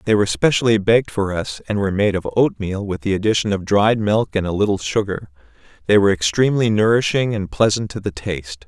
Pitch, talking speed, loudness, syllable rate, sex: 100 Hz, 205 wpm, -18 LUFS, 6.1 syllables/s, male